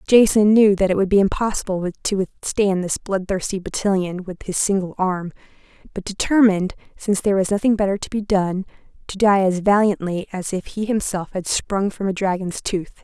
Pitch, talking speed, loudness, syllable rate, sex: 195 Hz, 190 wpm, -20 LUFS, 5.4 syllables/s, female